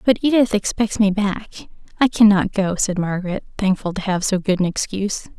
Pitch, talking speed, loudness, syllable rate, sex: 200 Hz, 180 wpm, -19 LUFS, 5.3 syllables/s, female